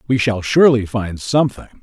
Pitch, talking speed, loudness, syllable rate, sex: 115 Hz, 165 wpm, -16 LUFS, 5.8 syllables/s, male